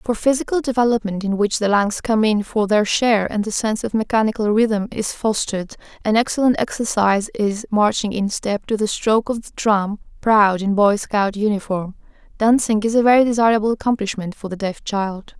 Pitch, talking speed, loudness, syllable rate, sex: 215 Hz, 185 wpm, -19 LUFS, 5.5 syllables/s, female